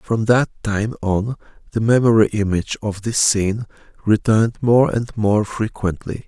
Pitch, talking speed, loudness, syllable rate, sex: 110 Hz, 145 wpm, -18 LUFS, 4.6 syllables/s, male